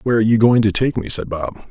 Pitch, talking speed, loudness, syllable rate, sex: 110 Hz, 315 wpm, -17 LUFS, 7.1 syllables/s, male